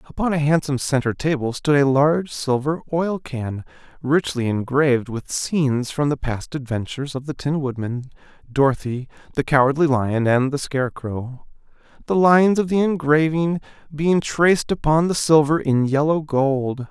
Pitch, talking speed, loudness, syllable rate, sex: 145 Hz, 155 wpm, -20 LUFS, 4.9 syllables/s, male